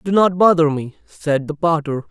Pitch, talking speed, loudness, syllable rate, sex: 160 Hz, 200 wpm, -17 LUFS, 4.8 syllables/s, male